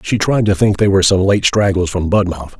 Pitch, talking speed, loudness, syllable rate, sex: 95 Hz, 255 wpm, -14 LUFS, 5.6 syllables/s, male